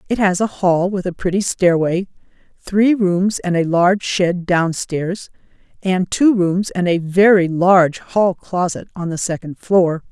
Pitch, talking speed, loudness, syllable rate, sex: 180 Hz, 165 wpm, -17 LUFS, 4.1 syllables/s, female